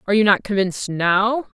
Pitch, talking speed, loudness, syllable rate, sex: 205 Hz, 190 wpm, -18 LUFS, 5.7 syllables/s, female